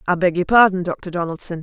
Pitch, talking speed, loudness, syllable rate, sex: 180 Hz, 220 wpm, -18 LUFS, 6.0 syllables/s, female